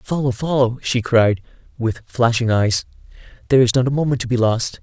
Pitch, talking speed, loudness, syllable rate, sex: 120 Hz, 185 wpm, -18 LUFS, 5.4 syllables/s, male